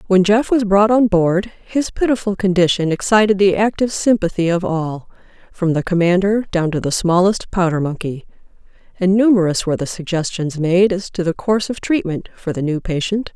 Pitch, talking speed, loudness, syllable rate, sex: 185 Hz, 180 wpm, -17 LUFS, 5.3 syllables/s, female